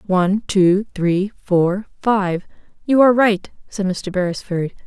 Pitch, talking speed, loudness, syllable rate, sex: 195 Hz, 85 wpm, -18 LUFS, 4.0 syllables/s, female